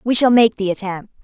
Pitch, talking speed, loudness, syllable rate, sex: 210 Hz, 240 wpm, -16 LUFS, 5.6 syllables/s, female